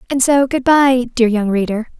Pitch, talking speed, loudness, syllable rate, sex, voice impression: 245 Hz, 210 wpm, -14 LUFS, 5.0 syllables/s, female, feminine, slightly young, cute, slightly refreshing, friendly